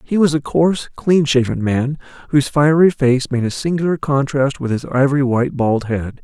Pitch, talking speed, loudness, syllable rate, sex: 140 Hz, 195 wpm, -17 LUFS, 5.2 syllables/s, male